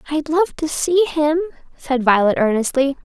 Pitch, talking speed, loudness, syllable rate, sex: 295 Hz, 150 wpm, -18 LUFS, 4.6 syllables/s, female